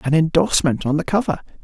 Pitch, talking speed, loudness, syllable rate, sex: 155 Hz, 185 wpm, -19 LUFS, 6.8 syllables/s, male